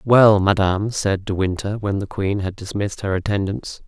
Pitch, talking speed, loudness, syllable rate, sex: 100 Hz, 185 wpm, -20 LUFS, 5.1 syllables/s, male